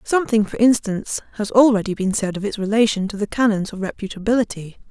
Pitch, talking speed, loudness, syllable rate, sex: 210 Hz, 185 wpm, -19 LUFS, 6.4 syllables/s, female